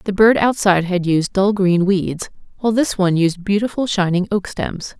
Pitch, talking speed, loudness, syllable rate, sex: 195 Hz, 190 wpm, -17 LUFS, 5.1 syllables/s, female